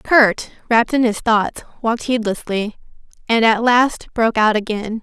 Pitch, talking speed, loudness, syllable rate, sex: 225 Hz, 155 wpm, -17 LUFS, 4.7 syllables/s, female